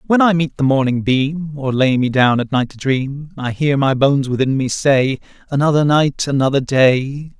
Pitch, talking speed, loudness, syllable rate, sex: 140 Hz, 205 wpm, -16 LUFS, 4.7 syllables/s, male